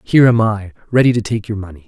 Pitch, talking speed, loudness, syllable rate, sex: 110 Hz, 255 wpm, -16 LUFS, 6.9 syllables/s, male